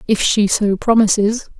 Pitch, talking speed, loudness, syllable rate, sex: 210 Hz, 150 wpm, -15 LUFS, 4.4 syllables/s, female